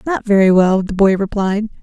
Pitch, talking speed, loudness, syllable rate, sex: 200 Hz, 195 wpm, -14 LUFS, 5.1 syllables/s, female